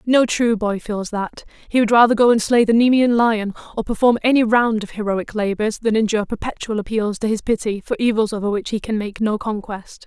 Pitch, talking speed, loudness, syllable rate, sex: 220 Hz, 220 wpm, -18 LUFS, 5.6 syllables/s, female